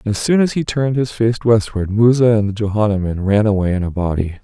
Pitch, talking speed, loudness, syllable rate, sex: 110 Hz, 245 wpm, -16 LUFS, 6.0 syllables/s, male